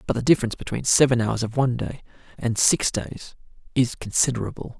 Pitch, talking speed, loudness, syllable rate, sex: 120 Hz, 175 wpm, -22 LUFS, 6.2 syllables/s, male